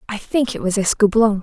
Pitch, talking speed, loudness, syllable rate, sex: 210 Hz, 210 wpm, -18 LUFS, 5.6 syllables/s, female